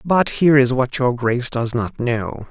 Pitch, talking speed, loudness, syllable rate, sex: 125 Hz, 215 wpm, -18 LUFS, 4.6 syllables/s, male